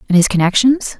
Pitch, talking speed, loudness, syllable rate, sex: 215 Hz, 180 wpm, -13 LUFS, 6.2 syllables/s, female